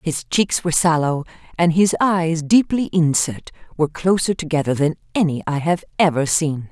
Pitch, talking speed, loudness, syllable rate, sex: 160 Hz, 160 wpm, -19 LUFS, 5.0 syllables/s, female